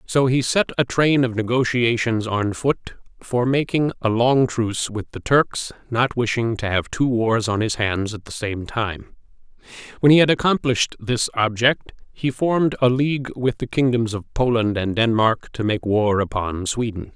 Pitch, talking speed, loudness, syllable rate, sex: 120 Hz, 180 wpm, -20 LUFS, 4.6 syllables/s, male